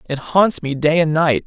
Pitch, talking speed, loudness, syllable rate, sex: 155 Hz, 245 wpm, -17 LUFS, 4.4 syllables/s, male